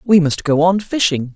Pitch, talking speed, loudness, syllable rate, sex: 165 Hz, 220 wpm, -15 LUFS, 4.8 syllables/s, female